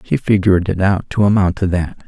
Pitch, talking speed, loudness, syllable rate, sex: 95 Hz, 230 wpm, -15 LUFS, 5.6 syllables/s, male